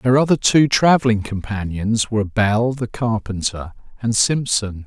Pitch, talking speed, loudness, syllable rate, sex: 115 Hz, 135 wpm, -18 LUFS, 4.4 syllables/s, male